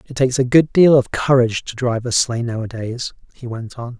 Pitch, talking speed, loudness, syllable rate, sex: 120 Hz, 225 wpm, -17 LUFS, 5.7 syllables/s, male